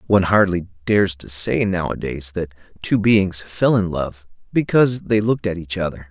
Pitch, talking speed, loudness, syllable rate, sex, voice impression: 95 Hz, 175 wpm, -19 LUFS, 5.2 syllables/s, male, masculine, adult-like, tensed, powerful, clear, fluent, slightly nasal, cool, intellectual, calm, slightly mature, friendly, reassuring, wild, lively, slightly kind